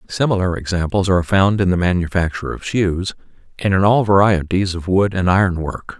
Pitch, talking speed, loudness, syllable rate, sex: 95 Hz, 180 wpm, -17 LUFS, 5.6 syllables/s, male